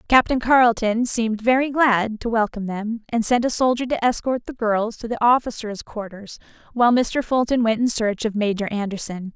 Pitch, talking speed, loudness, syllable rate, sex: 225 Hz, 185 wpm, -21 LUFS, 5.3 syllables/s, female